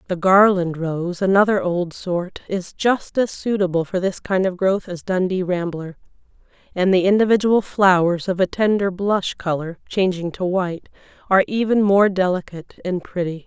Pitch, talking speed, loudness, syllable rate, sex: 185 Hz, 160 wpm, -19 LUFS, 4.9 syllables/s, female